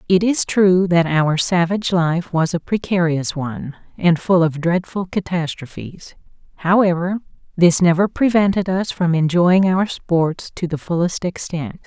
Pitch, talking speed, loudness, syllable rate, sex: 175 Hz, 145 wpm, -18 LUFS, 4.4 syllables/s, female